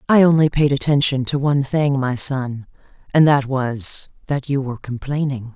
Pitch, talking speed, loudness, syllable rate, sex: 135 Hz, 175 wpm, -18 LUFS, 4.9 syllables/s, female